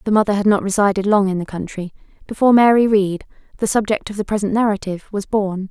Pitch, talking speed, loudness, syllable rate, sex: 205 Hz, 210 wpm, -17 LUFS, 6.6 syllables/s, female